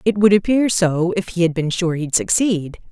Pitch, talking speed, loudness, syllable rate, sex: 180 Hz, 225 wpm, -18 LUFS, 4.8 syllables/s, female